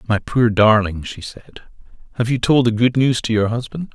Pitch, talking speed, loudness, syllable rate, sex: 115 Hz, 215 wpm, -17 LUFS, 5.2 syllables/s, male